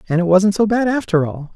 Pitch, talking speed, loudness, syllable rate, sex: 190 Hz, 270 wpm, -16 LUFS, 5.9 syllables/s, male